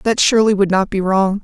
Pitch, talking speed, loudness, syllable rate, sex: 200 Hz, 250 wpm, -15 LUFS, 6.0 syllables/s, female